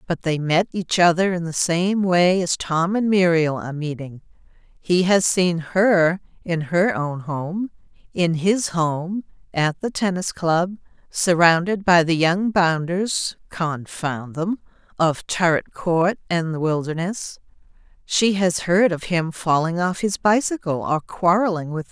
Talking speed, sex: 155 wpm, female